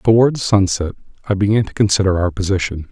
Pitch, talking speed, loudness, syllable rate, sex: 100 Hz, 165 wpm, -17 LUFS, 6.0 syllables/s, male